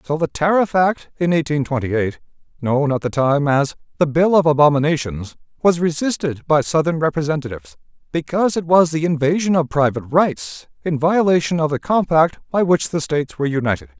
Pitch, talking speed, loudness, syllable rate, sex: 155 Hz, 175 wpm, -18 LUFS, 5.6 syllables/s, male